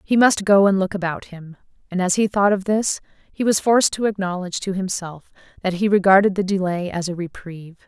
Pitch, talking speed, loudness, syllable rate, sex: 190 Hz, 205 wpm, -19 LUFS, 5.8 syllables/s, female